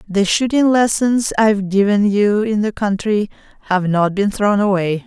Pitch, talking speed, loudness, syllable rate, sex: 205 Hz, 165 wpm, -16 LUFS, 4.5 syllables/s, female